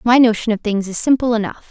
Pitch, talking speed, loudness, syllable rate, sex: 225 Hz, 245 wpm, -16 LUFS, 6.2 syllables/s, female